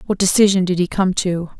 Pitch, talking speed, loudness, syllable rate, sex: 185 Hz, 225 wpm, -17 LUFS, 5.8 syllables/s, female